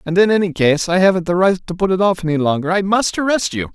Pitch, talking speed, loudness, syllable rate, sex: 180 Hz, 290 wpm, -16 LUFS, 6.4 syllables/s, male